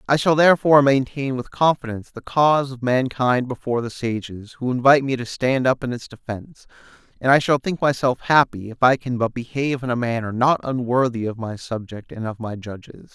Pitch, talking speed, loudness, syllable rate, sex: 125 Hz, 205 wpm, -20 LUFS, 5.7 syllables/s, male